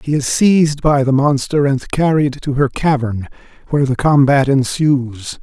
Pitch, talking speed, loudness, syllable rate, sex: 140 Hz, 165 wpm, -15 LUFS, 4.8 syllables/s, male